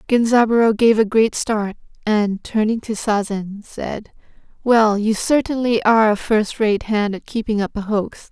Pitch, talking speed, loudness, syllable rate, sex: 215 Hz, 165 wpm, -18 LUFS, 4.4 syllables/s, female